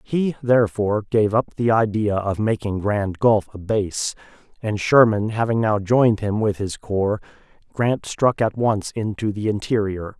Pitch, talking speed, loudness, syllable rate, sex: 105 Hz, 165 wpm, -21 LUFS, 4.4 syllables/s, male